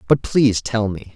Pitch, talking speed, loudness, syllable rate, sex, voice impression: 110 Hz, 210 wpm, -18 LUFS, 5.1 syllables/s, male, masculine, slightly young, slightly adult-like, thick, slightly tensed, slightly weak, slightly bright, soft, slightly clear, fluent, slightly raspy, cool, very intellectual, very refreshing, sincere, very calm, friendly, very reassuring, unique, very elegant, slightly wild, sweet, slightly lively, very kind, slightly modest